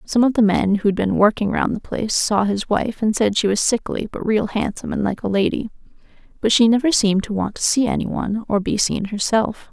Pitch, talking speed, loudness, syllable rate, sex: 215 Hz, 235 wpm, -19 LUFS, 5.5 syllables/s, female